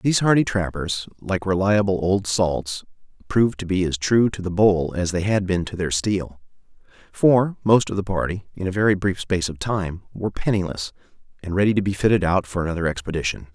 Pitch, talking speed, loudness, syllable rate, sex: 95 Hz, 200 wpm, -21 LUFS, 5.6 syllables/s, male